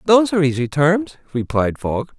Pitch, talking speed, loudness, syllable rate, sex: 155 Hz, 165 wpm, -18 LUFS, 5.5 syllables/s, male